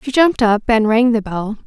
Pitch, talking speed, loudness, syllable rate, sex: 230 Hz, 255 wpm, -15 LUFS, 5.4 syllables/s, female